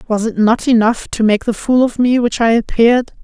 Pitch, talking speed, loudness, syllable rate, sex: 230 Hz, 240 wpm, -14 LUFS, 5.4 syllables/s, female